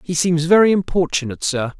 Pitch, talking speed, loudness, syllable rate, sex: 165 Hz, 165 wpm, -17 LUFS, 6.0 syllables/s, male